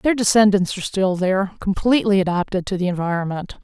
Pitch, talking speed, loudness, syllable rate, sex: 195 Hz, 165 wpm, -19 LUFS, 6.2 syllables/s, female